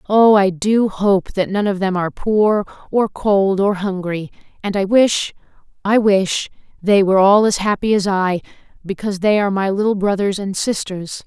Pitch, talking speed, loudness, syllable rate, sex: 200 Hz, 180 wpm, -17 LUFS, 4.8 syllables/s, female